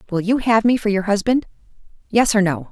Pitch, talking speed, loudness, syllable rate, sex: 210 Hz, 200 wpm, -18 LUFS, 5.8 syllables/s, female